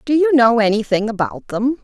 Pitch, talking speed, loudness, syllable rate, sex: 240 Hz, 195 wpm, -16 LUFS, 5.3 syllables/s, female